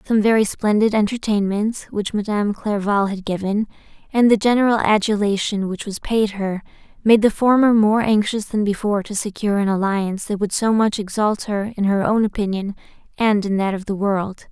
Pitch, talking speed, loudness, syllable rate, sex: 205 Hz, 180 wpm, -19 LUFS, 5.3 syllables/s, female